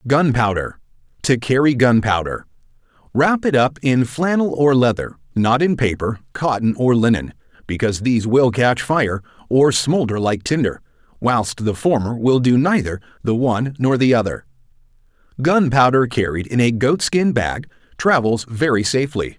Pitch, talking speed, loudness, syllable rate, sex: 125 Hz, 140 wpm, -17 LUFS, 4.8 syllables/s, male